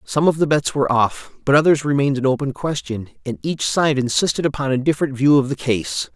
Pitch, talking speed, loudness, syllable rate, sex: 140 Hz, 225 wpm, -19 LUFS, 5.9 syllables/s, male